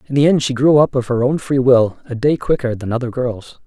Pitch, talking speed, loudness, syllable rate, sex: 125 Hz, 280 wpm, -16 LUFS, 5.5 syllables/s, male